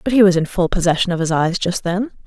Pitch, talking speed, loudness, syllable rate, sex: 185 Hz, 290 wpm, -17 LUFS, 6.4 syllables/s, female